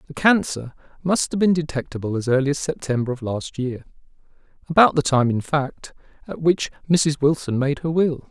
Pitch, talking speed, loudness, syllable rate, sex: 145 Hz, 180 wpm, -21 LUFS, 5.3 syllables/s, male